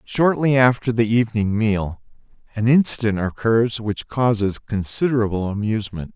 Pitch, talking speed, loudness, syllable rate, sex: 115 Hz, 115 wpm, -20 LUFS, 4.9 syllables/s, male